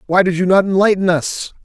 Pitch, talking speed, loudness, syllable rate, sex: 185 Hz, 220 wpm, -15 LUFS, 5.7 syllables/s, male